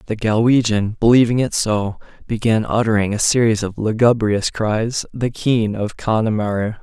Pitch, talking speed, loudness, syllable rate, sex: 110 Hz, 130 wpm, -18 LUFS, 4.6 syllables/s, male